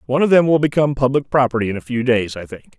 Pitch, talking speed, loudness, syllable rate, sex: 130 Hz, 280 wpm, -17 LUFS, 7.2 syllables/s, male